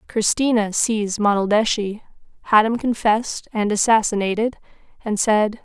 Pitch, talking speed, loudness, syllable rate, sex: 215 Hz, 105 wpm, -19 LUFS, 4.9 syllables/s, female